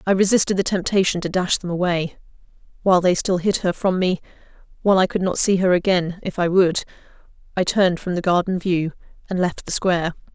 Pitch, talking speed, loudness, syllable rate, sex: 180 Hz, 190 wpm, -20 LUFS, 6.0 syllables/s, female